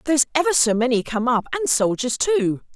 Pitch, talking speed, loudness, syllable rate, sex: 255 Hz, 195 wpm, -20 LUFS, 5.6 syllables/s, female